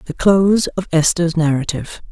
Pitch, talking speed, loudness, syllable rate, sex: 170 Hz, 140 wpm, -16 LUFS, 5.1 syllables/s, female